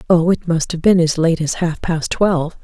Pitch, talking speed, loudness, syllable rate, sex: 165 Hz, 250 wpm, -16 LUFS, 5.0 syllables/s, female